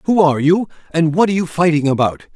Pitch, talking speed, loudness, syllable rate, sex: 165 Hz, 230 wpm, -16 LUFS, 6.8 syllables/s, male